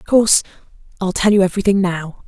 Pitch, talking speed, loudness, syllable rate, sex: 190 Hz, 185 wpm, -16 LUFS, 6.6 syllables/s, female